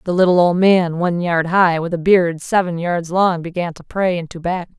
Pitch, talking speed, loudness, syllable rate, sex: 175 Hz, 240 wpm, -17 LUFS, 5.0 syllables/s, female